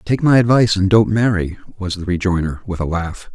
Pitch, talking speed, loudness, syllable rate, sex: 100 Hz, 215 wpm, -17 LUFS, 5.7 syllables/s, male